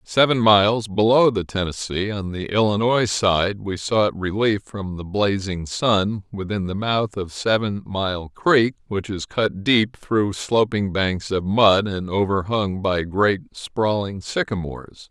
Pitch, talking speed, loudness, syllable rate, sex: 100 Hz, 150 wpm, -21 LUFS, 3.8 syllables/s, male